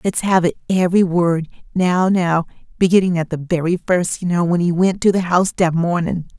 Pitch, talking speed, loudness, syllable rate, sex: 175 Hz, 180 wpm, -17 LUFS, 5.3 syllables/s, female